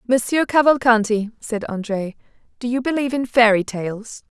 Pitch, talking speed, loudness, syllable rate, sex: 235 Hz, 140 wpm, -19 LUFS, 5.2 syllables/s, female